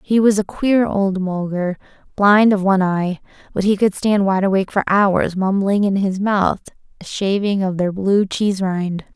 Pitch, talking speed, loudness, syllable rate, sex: 195 Hz, 190 wpm, -17 LUFS, 4.6 syllables/s, female